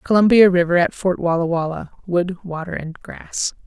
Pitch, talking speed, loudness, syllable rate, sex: 180 Hz, 145 wpm, -18 LUFS, 4.9 syllables/s, female